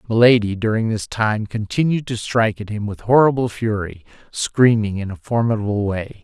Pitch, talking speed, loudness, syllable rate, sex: 110 Hz, 165 wpm, -19 LUFS, 5.2 syllables/s, male